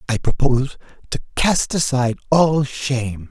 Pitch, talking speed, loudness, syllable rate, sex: 135 Hz, 125 wpm, -19 LUFS, 4.7 syllables/s, male